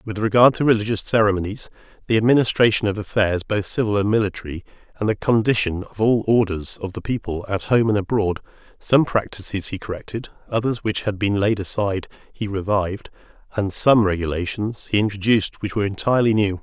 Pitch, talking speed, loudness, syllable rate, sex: 105 Hz, 170 wpm, -21 LUFS, 6.0 syllables/s, male